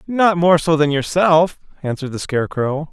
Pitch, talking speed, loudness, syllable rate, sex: 160 Hz, 165 wpm, -17 LUFS, 5.1 syllables/s, male